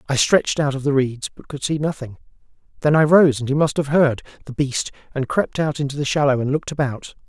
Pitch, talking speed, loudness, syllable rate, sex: 140 Hz, 240 wpm, -19 LUFS, 6.0 syllables/s, male